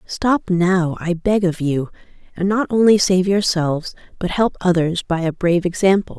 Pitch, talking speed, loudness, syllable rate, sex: 185 Hz, 175 wpm, -18 LUFS, 4.7 syllables/s, female